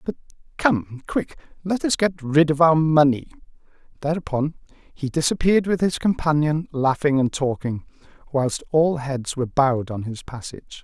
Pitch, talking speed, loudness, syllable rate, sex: 150 Hz, 150 wpm, -21 LUFS, 4.9 syllables/s, male